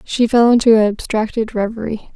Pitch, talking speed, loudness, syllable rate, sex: 225 Hz, 140 wpm, -15 LUFS, 4.9 syllables/s, female